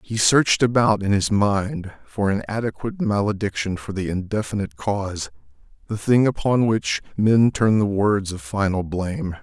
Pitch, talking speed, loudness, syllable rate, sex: 100 Hz, 160 wpm, -21 LUFS, 4.9 syllables/s, male